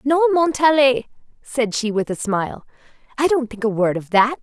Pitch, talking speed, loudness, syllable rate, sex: 240 Hz, 190 wpm, -19 LUFS, 4.9 syllables/s, female